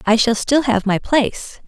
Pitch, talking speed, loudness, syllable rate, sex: 235 Hz, 215 wpm, -17 LUFS, 4.9 syllables/s, female